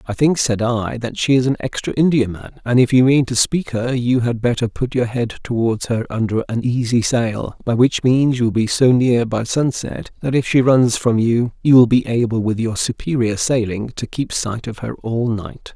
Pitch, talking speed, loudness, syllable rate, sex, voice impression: 120 Hz, 230 wpm, -17 LUFS, 4.8 syllables/s, male, very masculine, slightly old, very thick, tensed, slightly weak, slightly dark, slightly hard, fluent, slightly raspy, slightly cool, intellectual, refreshing, slightly sincere, calm, slightly friendly, slightly reassuring, unique, slightly elegant, wild, slightly sweet, slightly lively, kind, modest